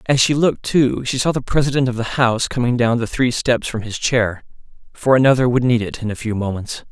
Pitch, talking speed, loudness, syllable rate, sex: 120 Hz, 245 wpm, -18 LUFS, 5.7 syllables/s, male